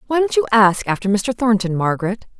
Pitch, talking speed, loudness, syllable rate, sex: 215 Hz, 200 wpm, -17 LUFS, 5.8 syllables/s, female